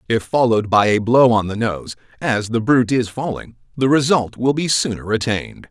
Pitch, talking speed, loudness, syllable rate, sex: 120 Hz, 200 wpm, -17 LUFS, 5.3 syllables/s, male